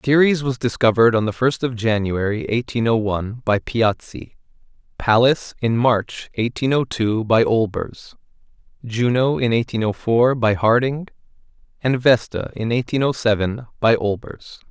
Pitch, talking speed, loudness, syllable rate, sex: 115 Hz, 145 wpm, -19 LUFS, 4.5 syllables/s, male